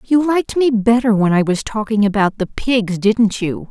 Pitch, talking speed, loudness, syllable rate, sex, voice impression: 220 Hz, 210 wpm, -16 LUFS, 4.7 syllables/s, female, feminine, slightly adult-like, tensed, clear, refreshing, slightly lively